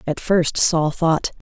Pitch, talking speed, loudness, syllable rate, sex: 165 Hz, 160 wpm, -18 LUFS, 3.3 syllables/s, female